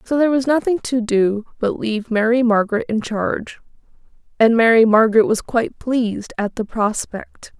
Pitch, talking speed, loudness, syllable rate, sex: 230 Hz, 165 wpm, -18 LUFS, 5.3 syllables/s, female